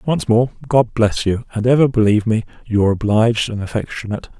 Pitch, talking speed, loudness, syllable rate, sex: 110 Hz, 175 wpm, -17 LUFS, 5.9 syllables/s, male